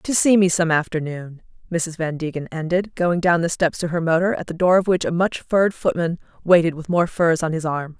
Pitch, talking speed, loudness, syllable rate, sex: 170 Hz, 240 wpm, -20 LUFS, 5.4 syllables/s, female